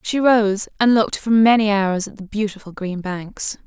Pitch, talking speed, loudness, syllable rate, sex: 210 Hz, 195 wpm, -19 LUFS, 4.7 syllables/s, female